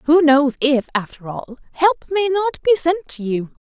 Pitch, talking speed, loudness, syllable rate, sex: 295 Hz, 200 wpm, -18 LUFS, 4.2 syllables/s, female